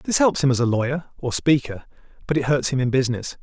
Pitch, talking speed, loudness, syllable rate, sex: 135 Hz, 245 wpm, -21 LUFS, 6.5 syllables/s, male